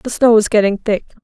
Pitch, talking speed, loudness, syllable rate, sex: 215 Hz, 245 wpm, -14 LUFS, 5.8 syllables/s, female